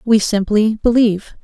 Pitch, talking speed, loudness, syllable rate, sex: 215 Hz, 125 wpm, -15 LUFS, 4.8 syllables/s, female